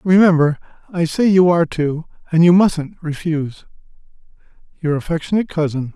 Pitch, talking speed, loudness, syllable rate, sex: 165 Hz, 120 wpm, -17 LUFS, 5.6 syllables/s, male